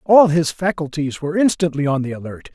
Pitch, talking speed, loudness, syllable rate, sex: 155 Hz, 190 wpm, -18 LUFS, 5.9 syllables/s, male